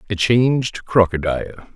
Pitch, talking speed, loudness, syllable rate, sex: 105 Hz, 100 wpm, -18 LUFS, 5.6 syllables/s, male